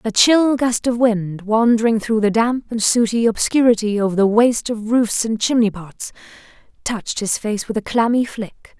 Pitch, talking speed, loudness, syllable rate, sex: 225 Hz, 185 wpm, -17 LUFS, 4.8 syllables/s, female